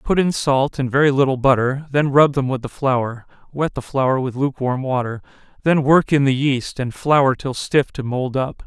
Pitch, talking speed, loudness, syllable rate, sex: 135 Hz, 195 wpm, -19 LUFS, 4.7 syllables/s, male